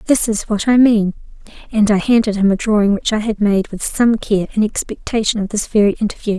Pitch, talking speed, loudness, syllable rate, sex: 210 Hz, 225 wpm, -16 LUFS, 5.8 syllables/s, female